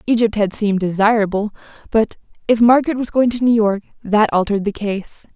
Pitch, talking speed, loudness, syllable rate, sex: 215 Hz, 180 wpm, -17 LUFS, 5.8 syllables/s, female